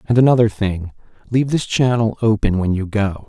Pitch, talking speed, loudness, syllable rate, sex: 110 Hz, 185 wpm, -17 LUFS, 5.4 syllables/s, male